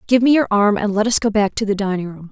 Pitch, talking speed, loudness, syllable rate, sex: 210 Hz, 335 wpm, -17 LUFS, 6.5 syllables/s, female